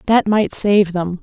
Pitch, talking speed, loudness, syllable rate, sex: 195 Hz, 195 wpm, -16 LUFS, 3.7 syllables/s, female